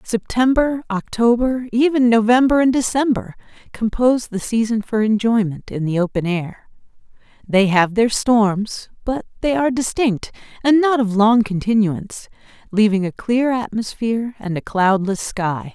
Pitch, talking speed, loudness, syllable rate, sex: 225 Hz, 135 wpm, -18 LUFS, 4.6 syllables/s, female